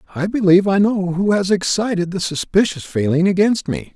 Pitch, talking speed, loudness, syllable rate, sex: 185 Hz, 180 wpm, -17 LUFS, 5.5 syllables/s, male